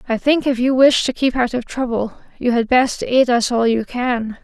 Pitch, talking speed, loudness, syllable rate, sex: 245 Hz, 245 wpm, -17 LUFS, 4.7 syllables/s, female